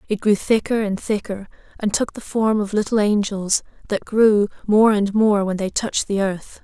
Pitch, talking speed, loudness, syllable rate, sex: 205 Hz, 200 wpm, -20 LUFS, 4.7 syllables/s, female